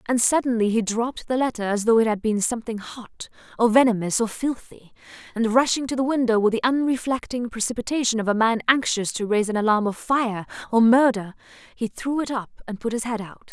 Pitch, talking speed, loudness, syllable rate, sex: 230 Hz, 210 wpm, -22 LUFS, 5.8 syllables/s, female